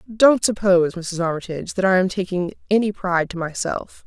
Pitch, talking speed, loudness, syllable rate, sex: 185 Hz, 175 wpm, -20 LUFS, 5.5 syllables/s, female